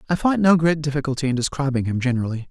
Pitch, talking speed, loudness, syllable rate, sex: 145 Hz, 215 wpm, -21 LUFS, 7.4 syllables/s, male